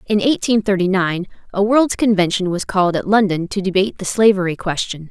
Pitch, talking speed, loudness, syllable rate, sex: 195 Hz, 190 wpm, -17 LUFS, 5.7 syllables/s, female